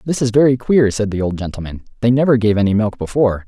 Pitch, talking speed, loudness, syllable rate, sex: 115 Hz, 240 wpm, -16 LUFS, 6.6 syllables/s, male